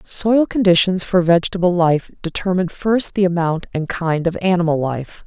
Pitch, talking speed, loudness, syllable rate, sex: 180 Hz, 160 wpm, -17 LUFS, 5.0 syllables/s, female